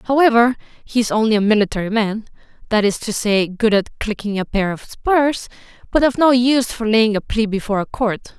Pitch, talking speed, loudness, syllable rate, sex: 225 Hz, 200 wpm, -17 LUFS, 5.5 syllables/s, female